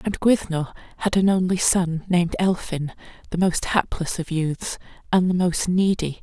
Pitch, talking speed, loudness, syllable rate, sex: 180 Hz, 165 wpm, -22 LUFS, 4.6 syllables/s, female